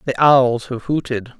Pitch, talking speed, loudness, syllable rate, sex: 130 Hz, 170 wpm, -17 LUFS, 4.4 syllables/s, male